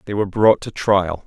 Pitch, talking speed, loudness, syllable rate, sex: 100 Hz, 235 wpm, -18 LUFS, 5.4 syllables/s, male